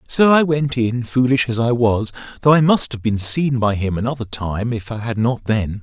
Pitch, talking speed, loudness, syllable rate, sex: 120 Hz, 235 wpm, -18 LUFS, 4.9 syllables/s, male